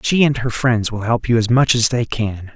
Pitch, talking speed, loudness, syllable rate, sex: 115 Hz, 280 wpm, -17 LUFS, 4.9 syllables/s, male